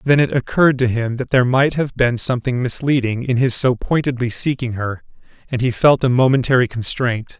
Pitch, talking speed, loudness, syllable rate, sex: 125 Hz, 195 wpm, -17 LUFS, 5.5 syllables/s, male